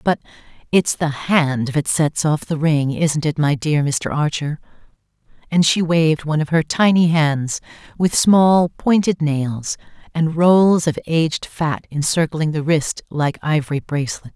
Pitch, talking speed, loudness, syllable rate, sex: 155 Hz, 160 wpm, -18 LUFS, 4.2 syllables/s, female